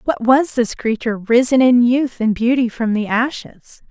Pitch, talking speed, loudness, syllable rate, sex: 240 Hz, 185 wpm, -16 LUFS, 4.6 syllables/s, female